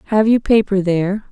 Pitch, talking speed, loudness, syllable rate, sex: 200 Hz, 185 wpm, -15 LUFS, 5.8 syllables/s, female